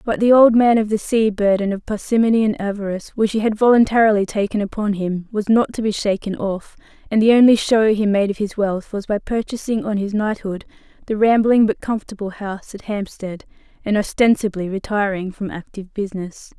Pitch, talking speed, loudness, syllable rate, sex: 210 Hz, 190 wpm, -18 LUFS, 5.7 syllables/s, female